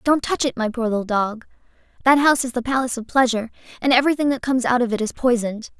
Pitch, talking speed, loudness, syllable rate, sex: 245 Hz, 230 wpm, -20 LUFS, 7.4 syllables/s, female